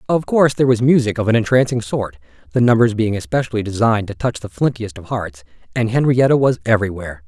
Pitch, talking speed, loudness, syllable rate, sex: 115 Hz, 200 wpm, -17 LUFS, 6.6 syllables/s, male